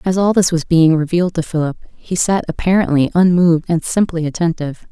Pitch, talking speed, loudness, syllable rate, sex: 170 Hz, 185 wpm, -15 LUFS, 5.9 syllables/s, female